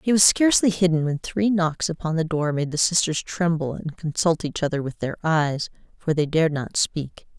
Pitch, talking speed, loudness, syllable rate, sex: 165 Hz, 210 wpm, -22 LUFS, 5.1 syllables/s, female